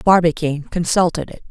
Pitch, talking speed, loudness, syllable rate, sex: 170 Hz, 120 wpm, -18 LUFS, 5.6 syllables/s, female